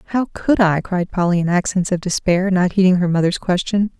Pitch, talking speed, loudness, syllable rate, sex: 185 Hz, 210 wpm, -17 LUFS, 5.4 syllables/s, female